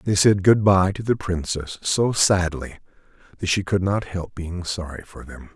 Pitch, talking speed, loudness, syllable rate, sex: 90 Hz, 195 wpm, -21 LUFS, 4.4 syllables/s, male